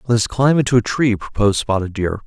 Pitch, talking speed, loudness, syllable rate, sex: 115 Hz, 240 wpm, -17 LUFS, 6.2 syllables/s, male